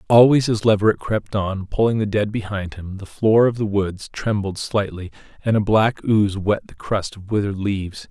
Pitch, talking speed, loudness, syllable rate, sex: 105 Hz, 200 wpm, -20 LUFS, 5.0 syllables/s, male